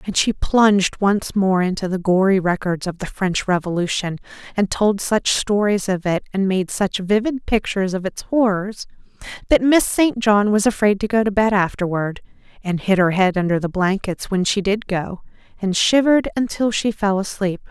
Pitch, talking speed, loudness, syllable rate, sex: 200 Hz, 185 wpm, -19 LUFS, 4.9 syllables/s, female